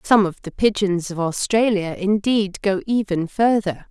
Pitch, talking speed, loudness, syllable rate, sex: 195 Hz, 155 wpm, -20 LUFS, 4.2 syllables/s, female